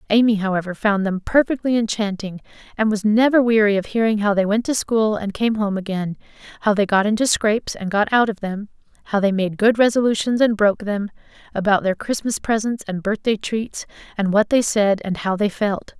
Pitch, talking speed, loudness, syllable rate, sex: 210 Hz, 205 wpm, -19 LUFS, 5.5 syllables/s, female